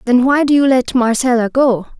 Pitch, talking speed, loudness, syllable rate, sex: 255 Hz, 210 wpm, -13 LUFS, 5.1 syllables/s, female